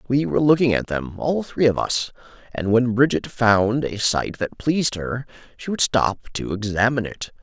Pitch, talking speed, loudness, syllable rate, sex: 120 Hz, 195 wpm, -21 LUFS, 5.1 syllables/s, male